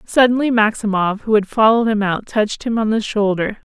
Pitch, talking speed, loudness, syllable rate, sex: 215 Hz, 195 wpm, -17 LUFS, 5.6 syllables/s, female